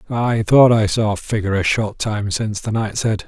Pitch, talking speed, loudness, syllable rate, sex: 105 Hz, 240 wpm, -18 LUFS, 5.3 syllables/s, male